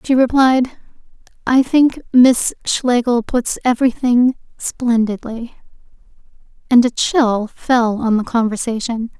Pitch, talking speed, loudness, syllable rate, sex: 240 Hz, 105 wpm, -16 LUFS, 3.9 syllables/s, female